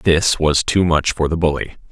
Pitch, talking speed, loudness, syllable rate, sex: 80 Hz, 220 wpm, -17 LUFS, 4.8 syllables/s, male